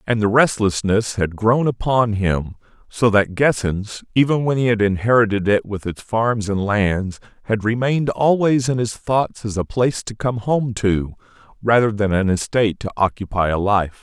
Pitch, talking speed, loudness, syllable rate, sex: 110 Hz, 180 wpm, -19 LUFS, 4.7 syllables/s, male